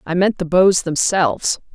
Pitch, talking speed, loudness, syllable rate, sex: 180 Hz, 170 wpm, -17 LUFS, 4.6 syllables/s, female